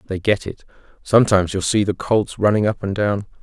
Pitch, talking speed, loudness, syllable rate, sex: 100 Hz, 210 wpm, -19 LUFS, 5.9 syllables/s, male